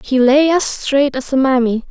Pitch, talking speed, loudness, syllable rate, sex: 270 Hz, 220 wpm, -14 LUFS, 4.5 syllables/s, female